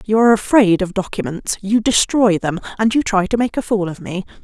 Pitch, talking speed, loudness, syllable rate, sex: 205 Hz, 230 wpm, -17 LUFS, 5.6 syllables/s, female